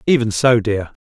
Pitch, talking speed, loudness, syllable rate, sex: 110 Hz, 175 wpm, -16 LUFS, 4.8 syllables/s, male